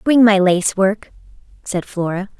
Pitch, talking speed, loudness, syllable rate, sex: 200 Hz, 150 wpm, -16 LUFS, 4.1 syllables/s, female